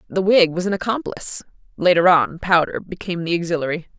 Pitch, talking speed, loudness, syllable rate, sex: 180 Hz, 165 wpm, -19 LUFS, 6.2 syllables/s, female